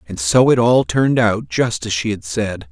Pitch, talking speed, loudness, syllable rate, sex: 110 Hz, 245 wpm, -16 LUFS, 4.6 syllables/s, male